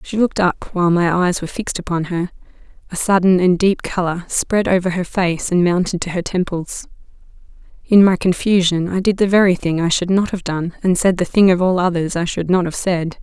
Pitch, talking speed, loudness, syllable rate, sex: 180 Hz, 220 wpm, -17 LUFS, 5.5 syllables/s, female